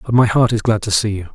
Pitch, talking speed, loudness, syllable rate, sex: 110 Hz, 355 wpm, -16 LUFS, 6.7 syllables/s, male